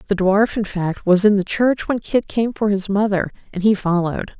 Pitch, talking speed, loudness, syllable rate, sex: 200 Hz, 230 wpm, -19 LUFS, 5.0 syllables/s, female